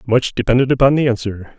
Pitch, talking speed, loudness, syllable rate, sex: 120 Hz, 190 wpm, -15 LUFS, 6.4 syllables/s, male